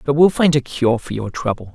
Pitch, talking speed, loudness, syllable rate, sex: 135 Hz, 275 wpm, -18 LUFS, 5.5 syllables/s, male